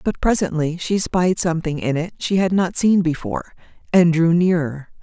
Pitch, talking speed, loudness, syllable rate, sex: 170 Hz, 180 wpm, -19 LUFS, 5.0 syllables/s, female